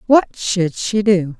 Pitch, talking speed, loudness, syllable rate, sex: 195 Hz, 170 wpm, -17 LUFS, 3.3 syllables/s, female